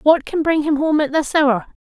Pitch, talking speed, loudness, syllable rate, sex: 295 Hz, 265 wpm, -17 LUFS, 4.8 syllables/s, female